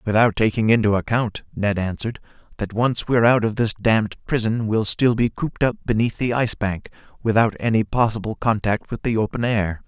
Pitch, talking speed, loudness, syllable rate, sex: 110 Hz, 190 wpm, -21 LUFS, 5.6 syllables/s, male